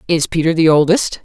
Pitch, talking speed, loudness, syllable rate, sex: 160 Hz, 195 wpm, -14 LUFS, 5.6 syllables/s, female